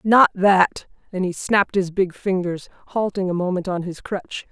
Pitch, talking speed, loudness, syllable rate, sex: 185 Hz, 185 wpm, -21 LUFS, 4.7 syllables/s, female